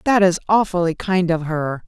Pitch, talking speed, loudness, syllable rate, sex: 180 Hz, 190 wpm, -19 LUFS, 4.8 syllables/s, female